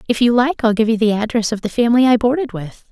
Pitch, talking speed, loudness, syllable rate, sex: 230 Hz, 290 wpm, -16 LUFS, 6.9 syllables/s, female